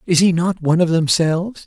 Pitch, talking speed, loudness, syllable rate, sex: 170 Hz, 215 wpm, -17 LUFS, 5.8 syllables/s, male